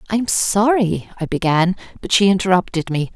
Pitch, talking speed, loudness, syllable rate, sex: 190 Hz, 170 wpm, -17 LUFS, 5.5 syllables/s, female